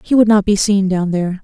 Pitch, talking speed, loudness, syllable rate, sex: 200 Hz, 290 wpm, -14 LUFS, 6.0 syllables/s, female